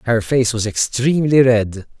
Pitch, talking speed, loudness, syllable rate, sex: 120 Hz, 150 wpm, -16 LUFS, 4.6 syllables/s, male